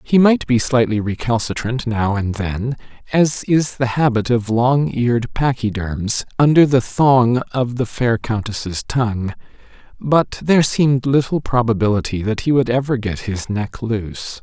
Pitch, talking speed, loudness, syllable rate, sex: 120 Hz, 155 wpm, -18 LUFS, 4.3 syllables/s, male